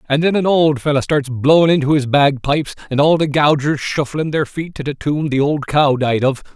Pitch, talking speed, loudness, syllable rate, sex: 145 Hz, 230 wpm, -16 LUFS, 5.3 syllables/s, male